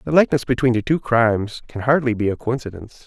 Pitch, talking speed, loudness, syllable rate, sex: 120 Hz, 215 wpm, -19 LUFS, 6.6 syllables/s, male